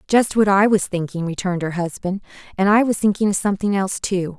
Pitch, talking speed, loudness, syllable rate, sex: 195 Hz, 220 wpm, -19 LUFS, 6.2 syllables/s, female